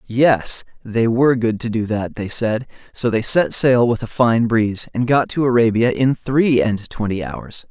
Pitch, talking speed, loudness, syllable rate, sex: 115 Hz, 200 wpm, -17 LUFS, 4.4 syllables/s, male